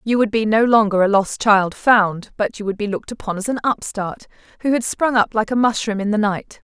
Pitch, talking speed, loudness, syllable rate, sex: 215 Hz, 250 wpm, -18 LUFS, 5.4 syllables/s, female